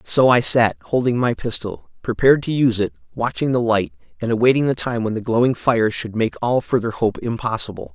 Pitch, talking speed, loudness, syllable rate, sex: 120 Hz, 205 wpm, -19 LUFS, 5.7 syllables/s, male